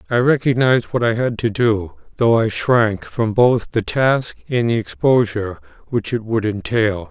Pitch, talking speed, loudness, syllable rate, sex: 115 Hz, 175 wpm, -18 LUFS, 4.5 syllables/s, male